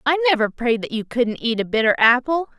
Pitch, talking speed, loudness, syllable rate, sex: 250 Hz, 230 wpm, -19 LUFS, 5.5 syllables/s, female